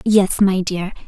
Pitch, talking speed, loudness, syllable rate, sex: 190 Hz, 165 wpm, -17 LUFS, 3.7 syllables/s, female